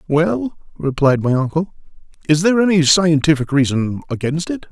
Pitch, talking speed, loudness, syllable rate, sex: 160 Hz, 140 wpm, -16 LUFS, 5.1 syllables/s, male